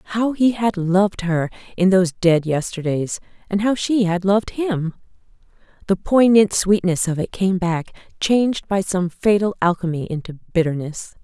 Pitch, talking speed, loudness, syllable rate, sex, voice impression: 190 Hz, 155 wpm, -19 LUFS, 4.8 syllables/s, female, feminine, adult-like, calm, elegant